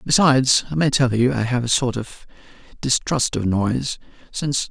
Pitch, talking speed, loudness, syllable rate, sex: 125 Hz, 180 wpm, -20 LUFS, 5.4 syllables/s, male